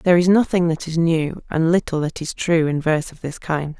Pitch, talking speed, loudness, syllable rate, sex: 165 Hz, 255 wpm, -20 LUFS, 5.4 syllables/s, female